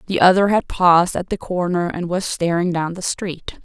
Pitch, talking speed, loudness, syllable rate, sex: 180 Hz, 215 wpm, -18 LUFS, 4.9 syllables/s, female